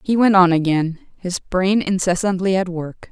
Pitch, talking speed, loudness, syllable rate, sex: 185 Hz, 155 wpm, -18 LUFS, 4.6 syllables/s, female